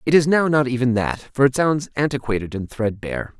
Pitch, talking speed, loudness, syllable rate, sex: 130 Hz, 210 wpm, -20 LUFS, 5.7 syllables/s, male